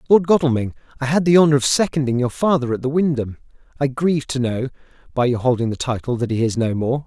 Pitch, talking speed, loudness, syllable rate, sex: 135 Hz, 230 wpm, -19 LUFS, 6.5 syllables/s, male